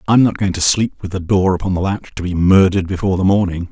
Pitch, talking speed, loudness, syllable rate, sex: 95 Hz, 275 wpm, -16 LUFS, 6.9 syllables/s, male